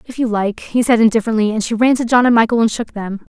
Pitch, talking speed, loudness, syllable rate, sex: 225 Hz, 285 wpm, -15 LUFS, 6.6 syllables/s, female